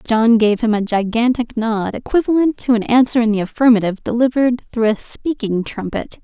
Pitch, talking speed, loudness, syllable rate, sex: 230 Hz, 175 wpm, -16 LUFS, 5.4 syllables/s, female